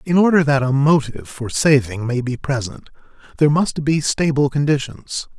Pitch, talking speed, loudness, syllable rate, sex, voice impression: 140 Hz, 165 wpm, -18 LUFS, 5.1 syllables/s, male, very masculine, slightly middle-aged, thick, cool, sincere, slightly wild